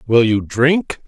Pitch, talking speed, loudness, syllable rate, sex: 130 Hz, 165 wpm, -16 LUFS, 3.3 syllables/s, male